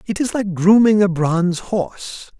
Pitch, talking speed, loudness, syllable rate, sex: 195 Hz, 175 wpm, -17 LUFS, 4.5 syllables/s, male